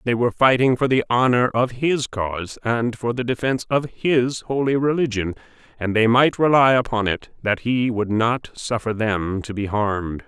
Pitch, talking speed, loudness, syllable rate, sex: 120 Hz, 185 wpm, -20 LUFS, 4.7 syllables/s, male